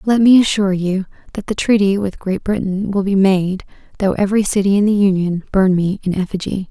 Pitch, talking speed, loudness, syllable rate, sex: 195 Hz, 205 wpm, -16 LUFS, 5.6 syllables/s, female